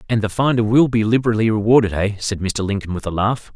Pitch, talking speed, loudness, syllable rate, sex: 110 Hz, 235 wpm, -18 LUFS, 6.3 syllables/s, male